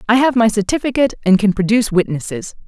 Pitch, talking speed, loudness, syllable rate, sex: 215 Hz, 180 wpm, -15 LUFS, 6.9 syllables/s, female